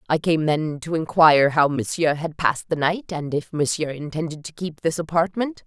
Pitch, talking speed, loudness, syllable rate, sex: 160 Hz, 200 wpm, -22 LUFS, 5.1 syllables/s, female